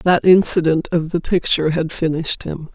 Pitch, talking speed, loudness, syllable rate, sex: 165 Hz, 175 wpm, -17 LUFS, 5.4 syllables/s, female